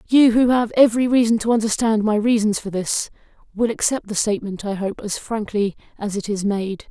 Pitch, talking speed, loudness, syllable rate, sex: 215 Hz, 200 wpm, -20 LUFS, 5.5 syllables/s, female